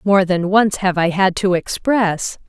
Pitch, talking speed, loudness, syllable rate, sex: 190 Hz, 195 wpm, -17 LUFS, 3.9 syllables/s, female